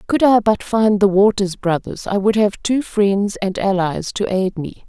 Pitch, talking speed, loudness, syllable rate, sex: 200 Hz, 210 wpm, -17 LUFS, 4.3 syllables/s, female